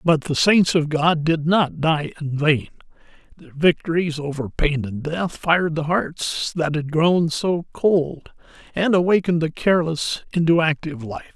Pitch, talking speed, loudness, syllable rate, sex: 160 Hz, 165 wpm, -20 LUFS, 4.4 syllables/s, male